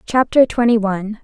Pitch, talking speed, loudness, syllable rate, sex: 225 Hz, 145 wpm, -15 LUFS, 5.4 syllables/s, female